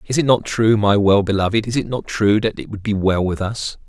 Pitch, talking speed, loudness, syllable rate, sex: 105 Hz, 280 wpm, -18 LUFS, 5.5 syllables/s, male